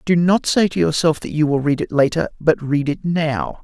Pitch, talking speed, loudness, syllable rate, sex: 150 Hz, 245 wpm, -18 LUFS, 5.0 syllables/s, male